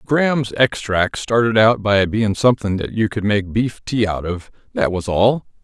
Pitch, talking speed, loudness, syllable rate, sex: 105 Hz, 180 wpm, -18 LUFS, 4.5 syllables/s, male